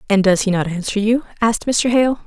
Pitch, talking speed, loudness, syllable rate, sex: 215 Hz, 240 wpm, -17 LUFS, 5.8 syllables/s, female